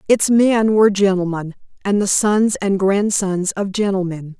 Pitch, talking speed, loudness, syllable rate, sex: 195 Hz, 150 wpm, -17 LUFS, 4.3 syllables/s, female